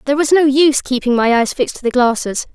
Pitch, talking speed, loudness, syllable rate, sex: 265 Hz, 260 wpm, -14 LUFS, 6.8 syllables/s, female